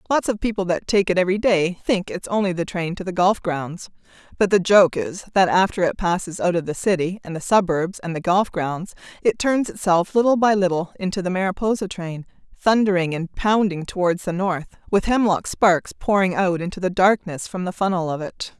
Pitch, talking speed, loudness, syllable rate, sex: 185 Hz, 210 wpm, -21 LUFS, 5.3 syllables/s, female